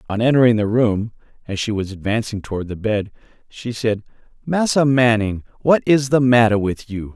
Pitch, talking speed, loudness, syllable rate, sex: 115 Hz, 175 wpm, -18 LUFS, 5.1 syllables/s, male